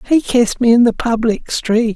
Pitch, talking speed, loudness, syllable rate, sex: 230 Hz, 215 wpm, -14 LUFS, 5.0 syllables/s, male